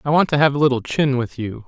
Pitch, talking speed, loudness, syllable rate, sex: 135 Hz, 320 wpm, -19 LUFS, 6.4 syllables/s, male